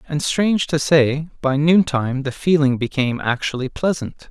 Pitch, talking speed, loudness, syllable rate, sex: 145 Hz, 155 wpm, -19 LUFS, 5.0 syllables/s, male